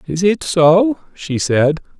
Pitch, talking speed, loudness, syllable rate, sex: 175 Hz, 150 wpm, -15 LUFS, 3.3 syllables/s, male